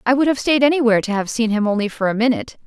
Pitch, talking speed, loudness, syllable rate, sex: 235 Hz, 290 wpm, -18 LUFS, 7.6 syllables/s, female